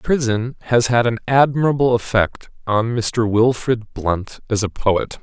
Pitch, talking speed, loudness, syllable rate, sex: 115 Hz, 150 wpm, -18 LUFS, 3.9 syllables/s, male